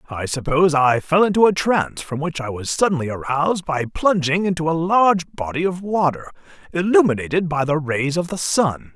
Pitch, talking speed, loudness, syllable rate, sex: 160 Hz, 190 wpm, -19 LUFS, 5.4 syllables/s, male